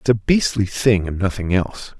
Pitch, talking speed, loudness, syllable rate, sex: 105 Hz, 210 wpm, -19 LUFS, 5.2 syllables/s, male